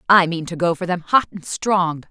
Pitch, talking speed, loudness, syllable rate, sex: 175 Hz, 255 wpm, -19 LUFS, 5.0 syllables/s, female